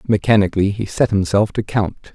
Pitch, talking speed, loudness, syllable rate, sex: 100 Hz, 170 wpm, -17 LUFS, 5.6 syllables/s, male